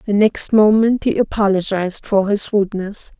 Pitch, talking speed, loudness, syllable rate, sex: 205 Hz, 150 wpm, -16 LUFS, 5.0 syllables/s, female